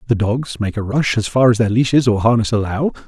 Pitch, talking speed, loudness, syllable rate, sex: 115 Hz, 255 wpm, -16 LUFS, 5.8 syllables/s, male